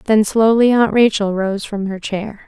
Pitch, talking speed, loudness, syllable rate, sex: 210 Hz, 195 wpm, -16 LUFS, 4.1 syllables/s, female